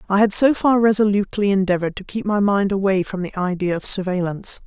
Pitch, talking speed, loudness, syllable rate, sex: 195 Hz, 205 wpm, -19 LUFS, 6.3 syllables/s, female